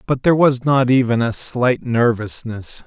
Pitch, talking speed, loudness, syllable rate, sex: 125 Hz, 170 wpm, -17 LUFS, 4.4 syllables/s, male